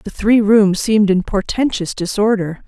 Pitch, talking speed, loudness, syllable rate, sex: 205 Hz, 155 wpm, -15 LUFS, 4.6 syllables/s, female